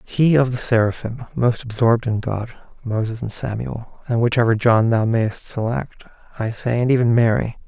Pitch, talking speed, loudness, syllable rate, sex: 115 Hz, 170 wpm, -20 LUFS, 4.8 syllables/s, male